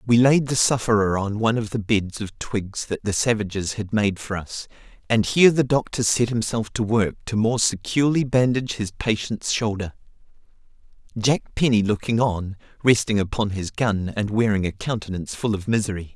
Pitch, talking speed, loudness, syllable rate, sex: 110 Hz, 180 wpm, -22 LUFS, 5.2 syllables/s, male